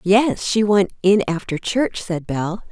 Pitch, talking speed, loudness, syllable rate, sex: 195 Hz, 175 wpm, -19 LUFS, 3.7 syllables/s, female